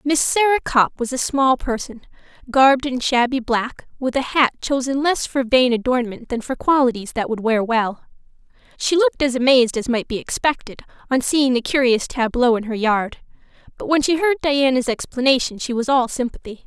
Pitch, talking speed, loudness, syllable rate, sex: 255 Hz, 185 wpm, -19 LUFS, 5.2 syllables/s, female